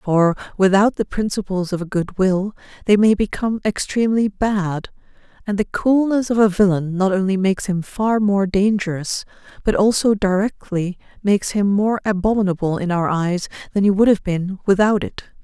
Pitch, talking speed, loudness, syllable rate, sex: 195 Hz, 165 wpm, -19 LUFS, 5.1 syllables/s, female